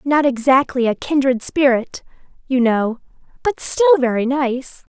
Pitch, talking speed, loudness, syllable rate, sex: 265 Hz, 135 wpm, -17 LUFS, 4.2 syllables/s, female